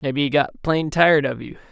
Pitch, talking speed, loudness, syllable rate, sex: 145 Hz, 245 wpm, -19 LUFS, 6.5 syllables/s, male